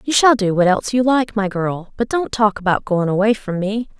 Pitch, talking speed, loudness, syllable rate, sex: 210 Hz, 255 wpm, -17 LUFS, 5.3 syllables/s, female